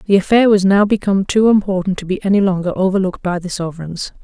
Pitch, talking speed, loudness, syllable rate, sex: 190 Hz, 210 wpm, -15 LUFS, 6.6 syllables/s, female